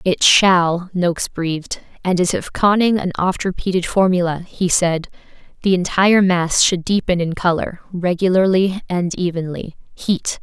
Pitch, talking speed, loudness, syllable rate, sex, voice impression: 180 Hz, 145 wpm, -17 LUFS, 4.5 syllables/s, female, feminine, slightly adult-like, slightly intellectual, slightly calm, slightly sweet